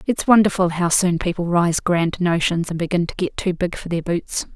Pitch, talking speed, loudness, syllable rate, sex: 175 Hz, 225 wpm, -19 LUFS, 5.0 syllables/s, female